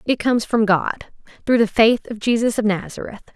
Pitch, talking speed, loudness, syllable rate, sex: 220 Hz, 195 wpm, -18 LUFS, 5.4 syllables/s, female